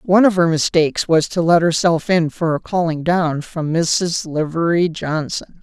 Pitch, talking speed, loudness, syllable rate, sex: 165 Hz, 180 wpm, -17 LUFS, 4.5 syllables/s, female